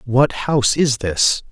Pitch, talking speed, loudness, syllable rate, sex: 125 Hz, 160 wpm, -17 LUFS, 3.7 syllables/s, male